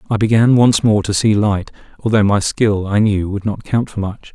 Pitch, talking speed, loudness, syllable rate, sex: 105 Hz, 235 wpm, -15 LUFS, 4.9 syllables/s, male